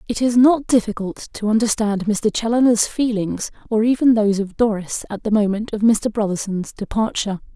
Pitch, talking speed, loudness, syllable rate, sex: 215 Hz, 165 wpm, -19 LUFS, 5.3 syllables/s, female